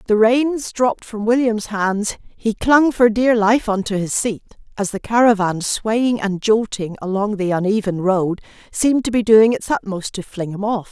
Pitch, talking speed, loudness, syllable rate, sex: 215 Hz, 190 wpm, -18 LUFS, 4.5 syllables/s, female